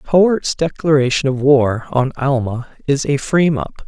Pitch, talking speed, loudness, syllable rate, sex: 140 Hz, 155 wpm, -16 LUFS, 4.6 syllables/s, male